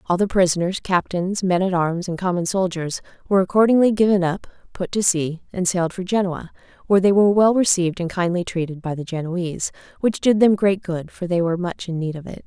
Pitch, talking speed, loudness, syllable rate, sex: 180 Hz, 215 wpm, -20 LUFS, 6.0 syllables/s, female